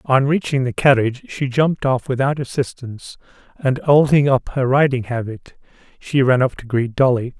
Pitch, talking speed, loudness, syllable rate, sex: 130 Hz, 170 wpm, -18 LUFS, 5.2 syllables/s, male